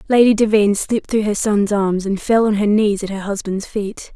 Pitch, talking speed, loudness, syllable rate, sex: 210 Hz, 230 wpm, -17 LUFS, 5.3 syllables/s, female